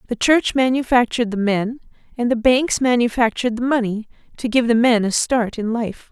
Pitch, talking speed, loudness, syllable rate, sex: 235 Hz, 185 wpm, -18 LUFS, 5.3 syllables/s, female